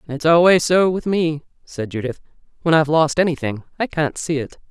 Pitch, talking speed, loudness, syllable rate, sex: 155 Hz, 190 wpm, -18 LUFS, 5.4 syllables/s, female